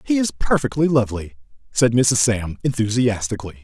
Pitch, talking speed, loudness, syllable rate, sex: 120 Hz, 130 wpm, -19 LUFS, 5.6 syllables/s, male